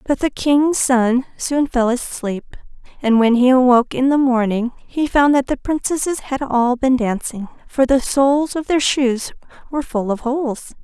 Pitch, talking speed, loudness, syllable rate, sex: 260 Hz, 185 wpm, -17 LUFS, 4.6 syllables/s, female